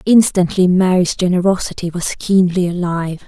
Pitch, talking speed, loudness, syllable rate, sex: 180 Hz, 110 wpm, -15 LUFS, 5.2 syllables/s, female